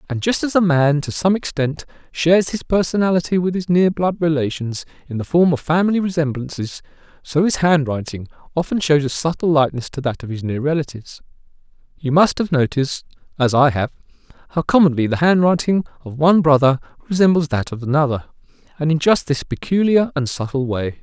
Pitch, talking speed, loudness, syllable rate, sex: 155 Hz, 175 wpm, -18 LUFS, 5.8 syllables/s, male